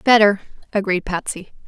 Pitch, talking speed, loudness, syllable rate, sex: 200 Hz, 105 wpm, -19 LUFS, 5.2 syllables/s, female